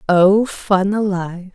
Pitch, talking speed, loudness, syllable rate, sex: 190 Hz, 115 wpm, -16 LUFS, 3.7 syllables/s, female